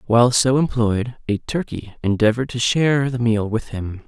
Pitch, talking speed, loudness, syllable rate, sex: 120 Hz, 175 wpm, -20 LUFS, 5.1 syllables/s, male